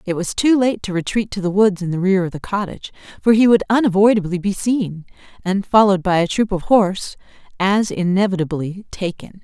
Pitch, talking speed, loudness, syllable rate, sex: 195 Hz, 195 wpm, -18 LUFS, 5.7 syllables/s, female